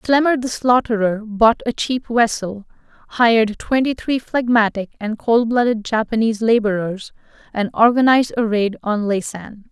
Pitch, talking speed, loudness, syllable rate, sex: 225 Hz, 135 wpm, -18 LUFS, 4.7 syllables/s, female